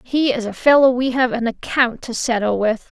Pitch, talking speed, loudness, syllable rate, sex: 240 Hz, 220 wpm, -18 LUFS, 5.0 syllables/s, female